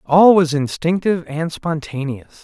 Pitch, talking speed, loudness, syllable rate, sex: 160 Hz, 125 wpm, -17 LUFS, 4.3 syllables/s, male